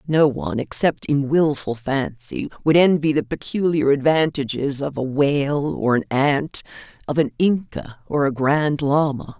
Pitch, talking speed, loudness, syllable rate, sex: 140 Hz, 155 wpm, -20 LUFS, 4.3 syllables/s, female